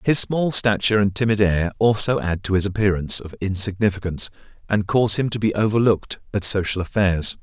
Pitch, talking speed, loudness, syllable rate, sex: 100 Hz, 180 wpm, -20 LUFS, 6.0 syllables/s, male